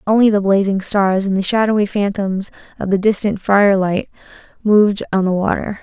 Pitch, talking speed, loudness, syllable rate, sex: 200 Hz, 165 wpm, -16 LUFS, 5.4 syllables/s, female